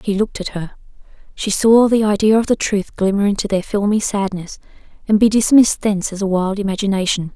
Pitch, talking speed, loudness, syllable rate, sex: 205 Hz, 195 wpm, -16 LUFS, 6.0 syllables/s, female